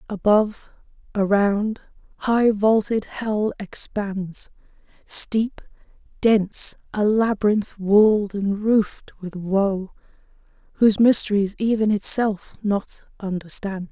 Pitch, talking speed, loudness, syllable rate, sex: 205 Hz, 90 wpm, -21 LUFS, 3.6 syllables/s, female